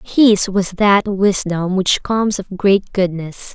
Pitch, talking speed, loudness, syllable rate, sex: 195 Hz, 150 wpm, -16 LUFS, 3.5 syllables/s, female